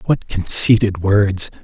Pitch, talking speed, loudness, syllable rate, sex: 100 Hz, 110 wpm, -15 LUFS, 3.6 syllables/s, male